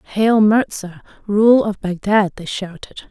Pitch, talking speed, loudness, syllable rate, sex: 205 Hz, 135 wpm, -16 LUFS, 4.3 syllables/s, female